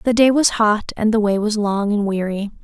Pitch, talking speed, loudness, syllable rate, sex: 215 Hz, 250 wpm, -18 LUFS, 5.1 syllables/s, female